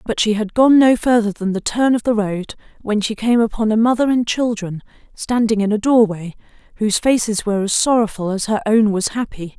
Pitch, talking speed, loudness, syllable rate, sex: 220 Hz, 215 wpm, -17 LUFS, 5.5 syllables/s, female